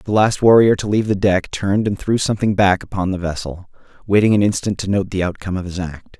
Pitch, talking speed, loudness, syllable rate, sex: 100 Hz, 240 wpm, -17 LUFS, 6.3 syllables/s, male